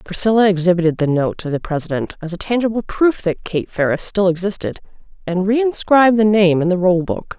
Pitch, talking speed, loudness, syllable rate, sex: 190 Hz, 195 wpm, -17 LUFS, 5.6 syllables/s, female